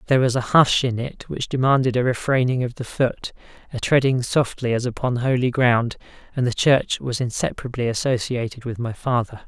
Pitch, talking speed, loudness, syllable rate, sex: 125 Hz, 185 wpm, -21 LUFS, 5.5 syllables/s, male